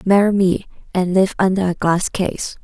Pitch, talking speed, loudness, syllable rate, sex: 185 Hz, 180 wpm, -18 LUFS, 4.6 syllables/s, female